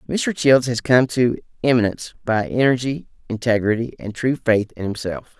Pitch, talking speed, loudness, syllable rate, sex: 125 Hz, 155 wpm, -20 LUFS, 5.0 syllables/s, male